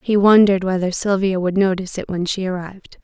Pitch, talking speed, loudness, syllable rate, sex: 190 Hz, 200 wpm, -18 LUFS, 6.2 syllables/s, female